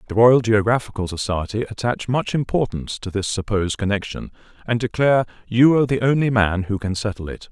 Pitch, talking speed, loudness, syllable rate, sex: 110 Hz, 175 wpm, -20 LUFS, 6.0 syllables/s, male